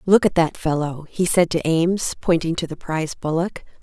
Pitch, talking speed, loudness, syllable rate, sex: 165 Hz, 205 wpm, -21 LUFS, 5.3 syllables/s, female